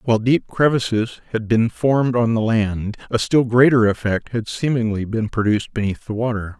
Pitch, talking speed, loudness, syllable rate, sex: 115 Hz, 180 wpm, -19 LUFS, 5.3 syllables/s, male